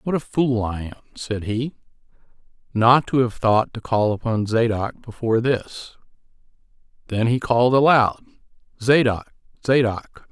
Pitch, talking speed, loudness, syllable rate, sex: 115 Hz, 135 wpm, -20 LUFS, 4.5 syllables/s, male